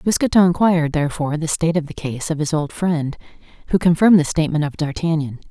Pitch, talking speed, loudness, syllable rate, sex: 160 Hz, 195 wpm, -18 LUFS, 6.7 syllables/s, female